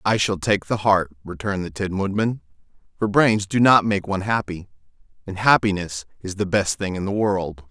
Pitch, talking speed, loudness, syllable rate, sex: 95 Hz, 195 wpm, -21 LUFS, 5.2 syllables/s, male